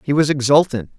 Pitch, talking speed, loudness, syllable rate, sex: 140 Hz, 185 wpm, -16 LUFS, 6.0 syllables/s, male